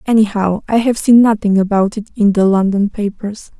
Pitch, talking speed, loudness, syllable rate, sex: 210 Hz, 185 wpm, -14 LUFS, 5.1 syllables/s, female